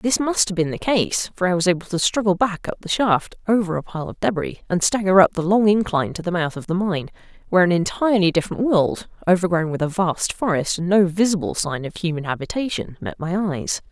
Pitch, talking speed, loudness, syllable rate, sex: 180 Hz, 230 wpm, -20 LUFS, 5.8 syllables/s, female